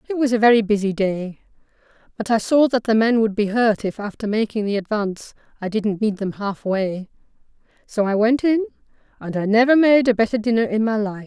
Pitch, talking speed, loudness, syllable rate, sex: 220 Hz, 210 wpm, -19 LUFS, 5.6 syllables/s, female